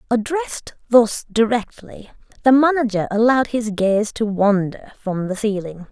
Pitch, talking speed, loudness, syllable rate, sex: 220 Hz, 130 wpm, -18 LUFS, 4.5 syllables/s, female